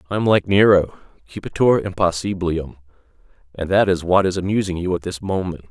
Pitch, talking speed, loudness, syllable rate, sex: 90 Hz, 160 wpm, -19 LUFS, 6.0 syllables/s, male